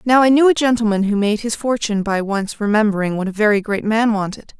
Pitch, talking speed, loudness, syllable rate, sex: 215 Hz, 235 wpm, -17 LUFS, 6.1 syllables/s, female